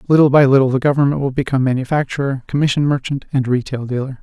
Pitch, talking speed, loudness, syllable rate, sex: 135 Hz, 185 wpm, -16 LUFS, 7.1 syllables/s, male